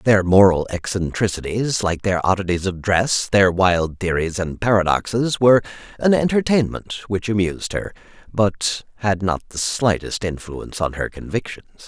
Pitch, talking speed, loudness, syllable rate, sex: 100 Hz, 140 wpm, -20 LUFS, 4.8 syllables/s, male